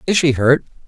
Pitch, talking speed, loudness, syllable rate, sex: 145 Hz, 205 wpm, -16 LUFS, 5.7 syllables/s, male